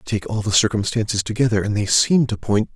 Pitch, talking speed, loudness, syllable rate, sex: 110 Hz, 220 wpm, -19 LUFS, 5.8 syllables/s, male